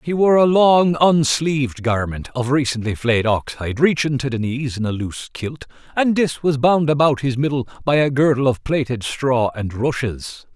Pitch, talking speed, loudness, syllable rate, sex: 135 Hz, 190 wpm, -18 LUFS, 4.8 syllables/s, male